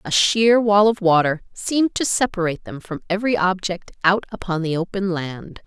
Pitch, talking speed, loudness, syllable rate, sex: 190 Hz, 180 wpm, -19 LUFS, 5.2 syllables/s, female